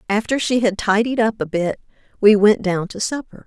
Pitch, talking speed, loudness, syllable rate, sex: 210 Hz, 210 wpm, -18 LUFS, 5.2 syllables/s, female